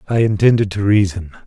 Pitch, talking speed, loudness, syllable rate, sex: 100 Hz, 165 wpm, -15 LUFS, 6.1 syllables/s, male